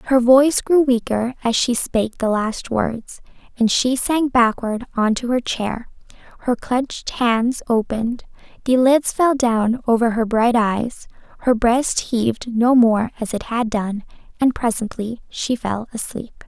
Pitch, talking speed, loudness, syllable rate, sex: 235 Hz, 160 wpm, -19 LUFS, 4.0 syllables/s, female